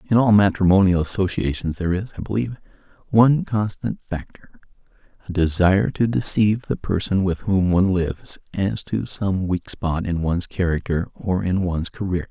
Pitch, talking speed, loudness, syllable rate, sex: 95 Hz, 155 wpm, -21 LUFS, 5.3 syllables/s, male